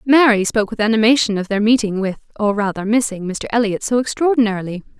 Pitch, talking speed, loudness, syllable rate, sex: 220 Hz, 180 wpm, -17 LUFS, 6.5 syllables/s, female